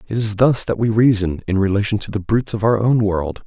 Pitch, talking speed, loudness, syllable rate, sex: 105 Hz, 260 wpm, -18 LUFS, 5.8 syllables/s, male